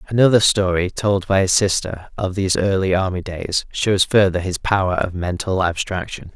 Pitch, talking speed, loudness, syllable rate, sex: 95 Hz, 170 wpm, -18 LUFS, 4.9 syllables/s, male